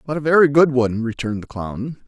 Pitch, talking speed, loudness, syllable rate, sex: 130 Hz, 230 wpm, -18 LUFS, 6.3 syllables/s, male